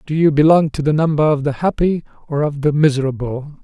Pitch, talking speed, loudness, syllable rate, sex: 150 Hz, 215 wpm, -16 LUFS, 5.9 syllables/s, male